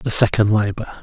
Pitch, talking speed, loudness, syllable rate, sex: 110 Hz, 175 wpm, -17 LUFS, 5.3 syllables/s, male